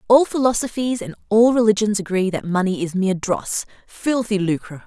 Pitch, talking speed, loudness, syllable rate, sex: 205 Hz, 160 wpm, -20 LUFS, 5.3 syllables/s, female